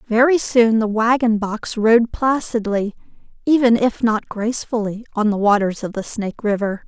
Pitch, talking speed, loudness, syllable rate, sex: 225 Hz, 155 wpm, -18 LUFS, 4.7 syllables/s, female